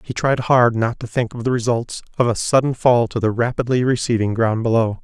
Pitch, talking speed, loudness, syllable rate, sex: 120 Hz, 225 wpm, -18 LUFS, 5.5 syllables/s, male